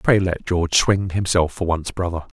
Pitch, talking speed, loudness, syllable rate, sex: 90 Hz, 200 wpm, -20 LUFS, 5.1 syllables/s, male